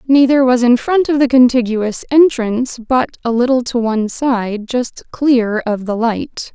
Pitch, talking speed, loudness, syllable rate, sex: 245 Hz, 175 wpm, -14 LUFS, 4.2 syllables/s, female